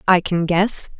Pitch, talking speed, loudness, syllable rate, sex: 180 Hz, 180 wpm, -18 LUFS, 3.8 syllables/s, female